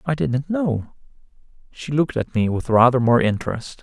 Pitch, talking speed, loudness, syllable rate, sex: 130 Hz, 170 wpm, -20 LUFS, 5.1 syllables/s, male